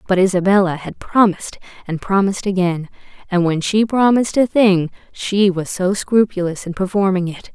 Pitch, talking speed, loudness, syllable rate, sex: 190 Hz, 160 wpm, -17 LUFS, 5.2 syllables/s, female